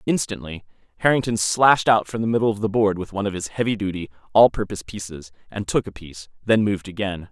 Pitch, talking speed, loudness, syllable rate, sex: 100 Hz, 215 wpm, -21 LUFS, 6.6 syllables/s, male